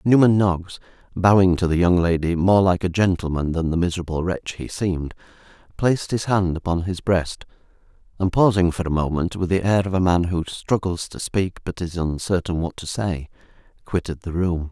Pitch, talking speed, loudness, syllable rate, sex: 90 Hz, 190 wpm, -21 LUFS, 5.2 syllables/s, male